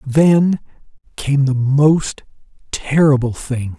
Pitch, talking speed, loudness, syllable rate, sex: 140 Hz, 95 wpm, -16 LUFS, 3.0 syllables/s, male